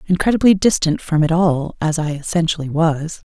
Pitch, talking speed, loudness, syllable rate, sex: 165 Hz, 165 wpm, -17 LUFS, 5.3 syllables/s, female